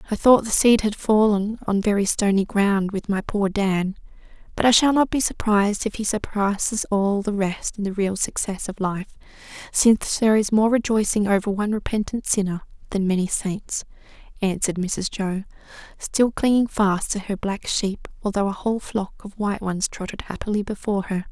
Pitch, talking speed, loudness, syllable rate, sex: 205 Hz, 185 wpm, -22 LUFS, 5.2 syllables/s, female